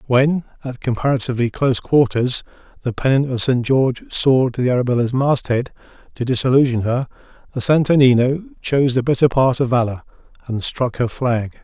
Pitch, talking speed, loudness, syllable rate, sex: 125 Hz, 160 wpm, -18 LUFS, 5.7 syllables/s, male